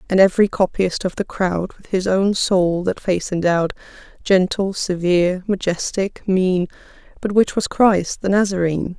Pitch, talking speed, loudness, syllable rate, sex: 185 Hz, 155 wpm, -19 LUFS, 4.7 syllables/s, female